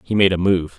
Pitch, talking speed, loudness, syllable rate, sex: 95 Hz, 305 wpm, -17 LUFS, 5.8 syllables/s, male